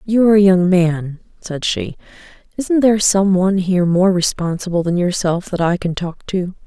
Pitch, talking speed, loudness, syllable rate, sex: 185 Hz, 190 wpm, -16 LUFS, 5.1 syllables/s, female